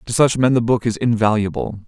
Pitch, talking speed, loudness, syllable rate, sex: 115 Hz, 225 wpm, -18 LUFS, 5.9 syllables/s, male